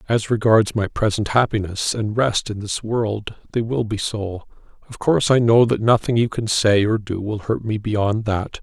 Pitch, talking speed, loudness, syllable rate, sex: 110 Hz, 210 wpm, -20 LUFS, 4.6 syllables/s, male